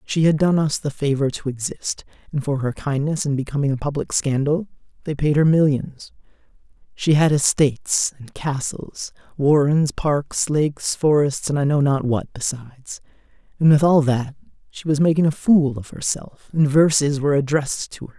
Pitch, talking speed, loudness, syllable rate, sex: 145 Hz, 175 wpm, -20 LUFS, 4.9 syllables/s, male